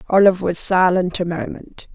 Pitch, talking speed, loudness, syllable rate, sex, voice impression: 180 Hz, 155 wpm, -17 LUFS, 5.2 syllables/s, female, very feminine, adult-like, slightly middle-aged, thin, tensed, powerful, bright, very hard, clear, slightly fluent, cool, slightly intellectual, refreshing, sincere, slightly calm, slightly friendly, slightly reassuring, unique, wild, lively, strict, intense, sharp